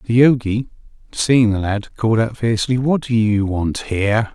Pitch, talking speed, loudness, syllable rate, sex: 115 Hz, 180 wpm, -17 LUFS, 4.8 syllables/s, male